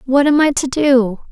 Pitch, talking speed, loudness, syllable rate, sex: 270 Hz, 230 wpm, -14 LUFS, 4.5 syllables/s, female